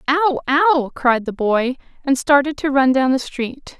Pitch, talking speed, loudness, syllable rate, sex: 270 Hz, 190 wpm, -17 LUFS, 4.0 syllables/s, female